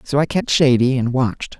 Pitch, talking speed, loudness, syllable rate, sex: 135 Hz, 225 wpm, -17 LUFS, 5.4 syllables/s, male